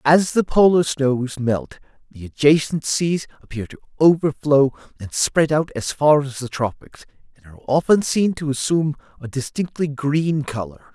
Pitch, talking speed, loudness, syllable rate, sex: 145 Hz, 160 wpm, -19 LUFS, 4.7 syllables/s, male